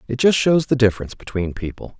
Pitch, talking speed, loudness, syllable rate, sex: 120 Hz, 210 wpm, -19 LUFS, 6.6 syllables/s, male